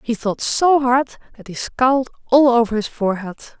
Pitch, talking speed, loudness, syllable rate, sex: 240 Hz, 185 wpm, -17 LUFS, 5.1 syllables/s, female